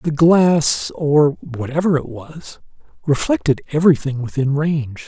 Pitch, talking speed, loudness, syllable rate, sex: 145 Hz, 120 wpm, -17 LUFS, 4.2 syllables/s, male